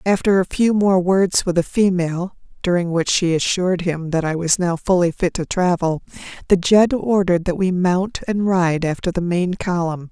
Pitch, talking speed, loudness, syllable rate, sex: 180 Hz, 195 wpm, -18 LUFS, 4.9 syllables/s, female